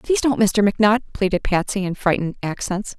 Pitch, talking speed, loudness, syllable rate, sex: 200 Hz, 180 wpm, -20 LUFS, 6.1 syllables/s, female